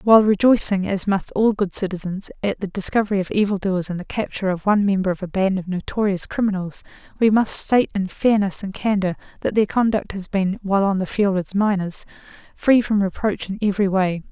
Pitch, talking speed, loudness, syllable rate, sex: 195 Hz, 205 wpm, -20 LUFS, 5.9 syllables/s, female